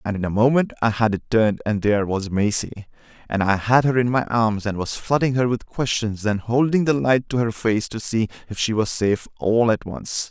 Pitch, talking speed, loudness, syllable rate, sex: 115 Hz, 240 wpm, -21 LUFS, 5.3 syllables/s, male